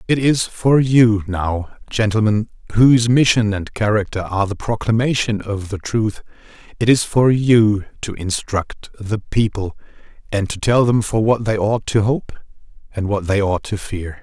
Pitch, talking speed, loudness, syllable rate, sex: 110 Hz, 170 wpm, -18 LUFS, 4.4 syllables/s, male